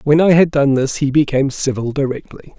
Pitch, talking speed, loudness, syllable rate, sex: 140 Hz, 210 wpm, -15 LUFS, 5.7 syllables/s, male